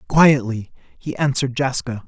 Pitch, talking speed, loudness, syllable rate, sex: 130 Hz, 115 wpm, -19 LUFS, 5.0 syllables/s, male